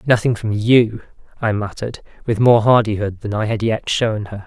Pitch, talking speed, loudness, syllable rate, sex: 110 Hz, 190 wpm, -18 LUFS, 5.1 syllables/s, male